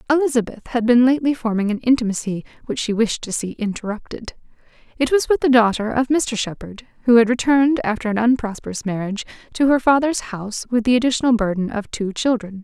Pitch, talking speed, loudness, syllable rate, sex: 235 Hz, 185 wpm, -19 LUFS, 6.1 syllables/s, female